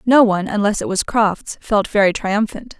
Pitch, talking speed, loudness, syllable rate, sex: 210 Hz, 195 wpm, -17 LUFS, 4.9 syllables/s, female